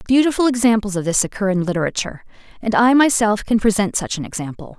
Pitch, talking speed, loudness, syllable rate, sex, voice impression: 210 Hz, 190 wpm, -18 LUFS, 6.5 syllables/s, female, very feminine, slightly young, slightly adult-like, very thin, very tensed, powerful, very bright, hard, very clear, very fluent, cute, intellectual, slightly refreshing, slightly sincere, friendly, slightly reassuring, unique, slightly wild, very lively, intense, slightly sharp, light